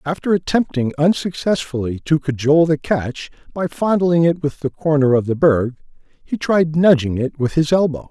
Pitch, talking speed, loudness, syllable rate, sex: 155 Hz, 170 wpm, -18 LUFS, 4.9 syllables/s, male